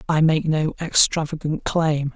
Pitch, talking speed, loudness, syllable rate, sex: 155 Hz, 140 wpm, -20 LUFS, 4.1 syllables/s, male